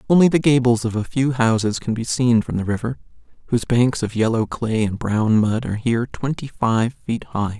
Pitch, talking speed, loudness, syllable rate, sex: 115 Hz, 215 wpm, -20 LUFS, 5.2 syllables/s, male